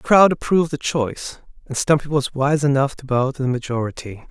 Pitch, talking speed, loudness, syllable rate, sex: 140 Hz, 210 wpm, -20 LUFS, 5.7 syllables/s, male